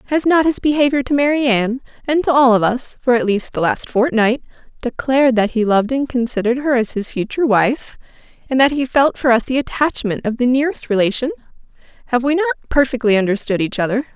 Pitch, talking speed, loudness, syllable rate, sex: 250 Hz, 200 wpm, -17 LUFS, 6.1 syllables/s, female